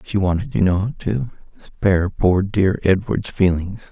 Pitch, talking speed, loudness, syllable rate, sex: 100 Hz, 155 wpm, -19 LUFS, 4.0 syllables/s, male